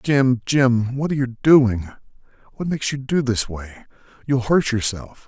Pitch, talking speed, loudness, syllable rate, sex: 125 Hz, 125 wpm, -20 LUFS, 4.5 syllables/s, male